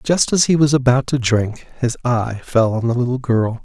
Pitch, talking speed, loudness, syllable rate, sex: 125 Hz, 230 wpm, -17 LUFS, 4.8 syllables/s, male